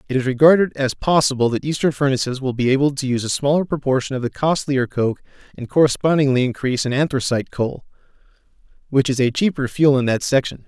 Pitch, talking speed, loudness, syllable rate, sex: 135 Hz, 190 wpm, -19 LUFS, 6.4 syllables/s, male